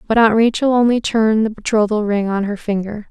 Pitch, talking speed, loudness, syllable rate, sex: 215 Hz, 215 wpm, -16 LUFS, 5.8 syllables/s, female